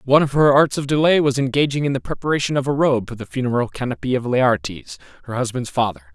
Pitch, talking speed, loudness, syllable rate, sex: 130 Hz, 225 wpm, -19 LUFS, 6.9 syllables/s, male